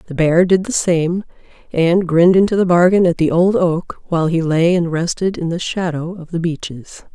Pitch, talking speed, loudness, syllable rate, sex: 170 Hz, 210 wpm, -16 LUFS, 5.0 syllables/s, female